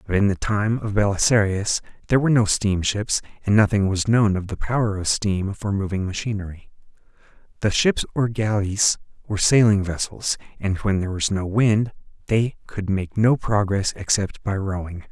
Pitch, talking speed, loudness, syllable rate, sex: 100 Hz, 170 wpm, -21 LUFS, 5.1 syllables/s, male